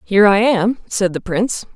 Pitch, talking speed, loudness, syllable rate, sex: 205 Hz, 205 wpm, -16 LUFS, 5.3 syllables/s, female